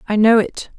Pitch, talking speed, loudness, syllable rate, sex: 220 Hz, 230 wpm, -14 LUFS, 5.3 syllables/s, female